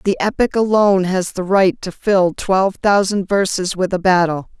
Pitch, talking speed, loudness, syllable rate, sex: 190 Hz, 185 wpm, -16 LUFS, 4.8 syllables/s, female